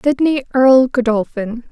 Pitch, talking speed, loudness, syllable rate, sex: 250 Hz, 105 wpm, -14 LUFS, 4.1 syllables/s, female